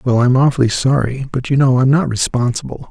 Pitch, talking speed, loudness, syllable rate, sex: 130 Hz, 205 wpm, -15 LUFS, 5.8 syllables/s, male